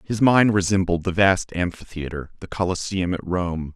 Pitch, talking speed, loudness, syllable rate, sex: 90 Hz, 160 wpm, -22 LUFS, 4.8 syllables/s, male